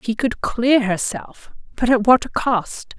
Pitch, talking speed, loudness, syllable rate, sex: 235 Hz, 180 wpm, -18 LUFS, 3.8 syllables/s, female